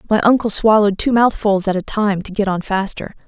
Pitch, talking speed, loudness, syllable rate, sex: 205 Hz, 220 wpm, -16 LUFS, 5.7 syllables/s, female